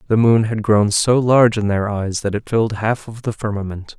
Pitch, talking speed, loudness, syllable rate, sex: 110 Hz, 240 wpm, -17 LUFS, 5.3 syllables/s, male